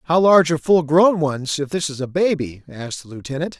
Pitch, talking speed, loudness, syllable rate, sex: 150 Hz, 235 wpm, -18 LUFS, 6.0 syllables/s, male